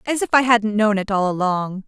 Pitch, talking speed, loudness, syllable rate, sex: 215 Hz, 255 wpm, -18 LUFS, 5.2 syllables/s, female